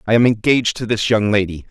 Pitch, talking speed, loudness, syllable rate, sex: 110 Hz, 245 wpm, -16 LUFS, 6.4 syllables/s, male